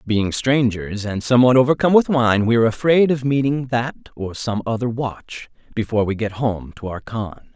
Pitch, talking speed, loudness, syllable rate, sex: 120 Hz, 190 wpm, -19 LUFS, 5.3 syllables/s, male